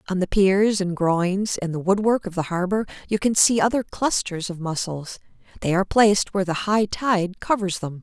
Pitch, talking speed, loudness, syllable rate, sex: 190 Hz, 200 wpm, -22 LUFS, 5.2 syllables/s, female